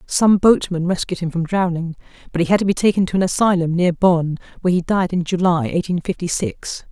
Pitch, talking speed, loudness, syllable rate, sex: 175 Hz, 215 wpm, -18 LUFS, 5.7 syllables/s, female